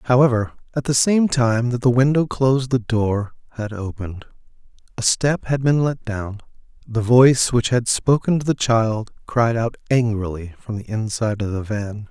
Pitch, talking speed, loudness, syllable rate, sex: 120 Hz, 180 wpm, -19 LUFS, 4.7 syllables/s, male